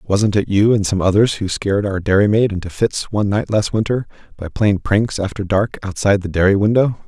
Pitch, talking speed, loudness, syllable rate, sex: 100 Hz, 210 wpm, -17 LUFS, 5.6 syllables/s, male